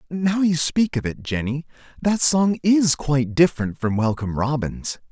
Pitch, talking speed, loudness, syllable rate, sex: 150 Hz, 165 wpm, -21 LUFS, 4.7 syllables/s, male